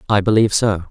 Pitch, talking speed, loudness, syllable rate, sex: 105 Hz, 200 wpm, -16 LUFS, 7.4 syllables/s, male